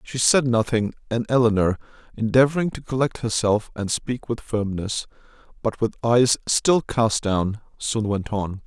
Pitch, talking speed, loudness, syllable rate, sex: 115 Hz, 150 wpm, -22 LUFS, 4.4 syllables/s, male